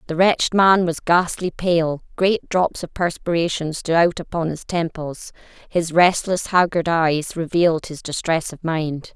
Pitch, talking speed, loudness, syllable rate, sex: 170 Hz, 155 wpm, -20 LUFS, 4.2 syllables/s, female